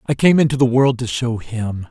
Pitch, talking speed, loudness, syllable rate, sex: 125 Hz, 250 wpm, -17 LUFS, 5.0 syllables/s, male